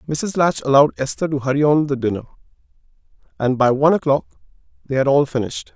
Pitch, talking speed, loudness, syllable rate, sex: 140 Hz, 175 wpm, -18 LUFS, 7.0 syllables/s, male